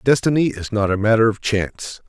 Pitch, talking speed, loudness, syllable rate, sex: 110 Hz, 200 wpm, -18 LUFS, 5.6 syllables/s, male